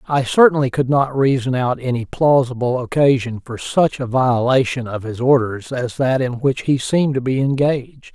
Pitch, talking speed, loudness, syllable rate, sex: 130 Hz, 185 wpm, -17 LUFS, 4.9 syllables/s, male